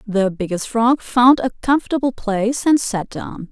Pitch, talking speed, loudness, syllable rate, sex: 230 Hz, 170 wpm, -18 LUFS, 4.5 syllables/s, female